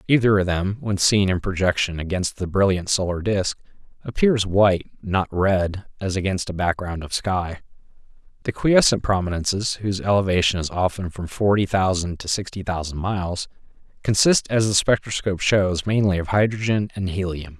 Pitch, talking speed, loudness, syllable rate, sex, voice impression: 95 Hz, 155 wpm, -21 LUFS, 5.1 syllables/s, male, masculine, middle-aged, tensed, powerful, bright, clear, cool, intellectual, calm, friendly, reassuring, wild, kind